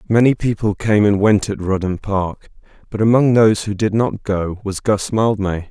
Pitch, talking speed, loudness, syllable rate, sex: 105 Hz, 190 wpm, -17 LUFS, 4.8 syllables/s, male